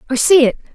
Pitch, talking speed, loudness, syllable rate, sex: 280 Hz, 245 wpm, -13 LUFS, 7.9 syllables/s, female